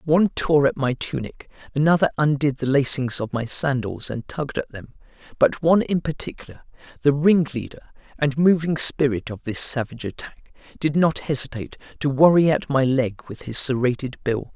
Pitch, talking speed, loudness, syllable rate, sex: 140 Hz, 170 wpm, -21 LUFS, 5.3 syllables/s, male